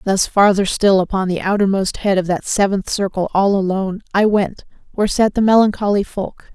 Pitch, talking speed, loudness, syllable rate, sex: 195 Hz, 185 wpm, -16 LUFS, 5.3 syllables/s, female